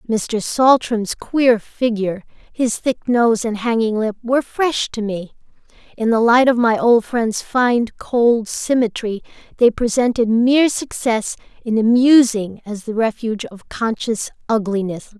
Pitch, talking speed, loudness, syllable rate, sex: 230 Hz, 140 wpm, -17 LUFS, 4.2 syllables/s, female